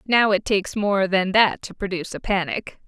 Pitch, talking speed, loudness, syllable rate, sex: 195 Hz, 210 wpm, -21 LUFS, 5.2 syllables/s, female